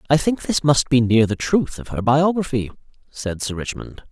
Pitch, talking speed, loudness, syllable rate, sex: 135 Hz, 205 wpm, -20 LUFS, 4.9 syllables/s, male